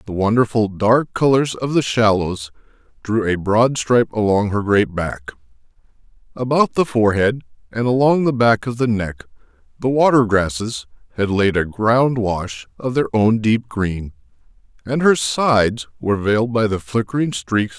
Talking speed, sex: 170 wpm, male